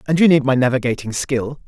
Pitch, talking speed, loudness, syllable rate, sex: 135 Hz, 215 wpm, -17 LUFS, 6.2 syllables/s, male